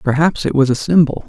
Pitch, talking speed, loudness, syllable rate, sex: 145 Hz, 235 wpm, -15 LUFS, 6.0 syllables/s, male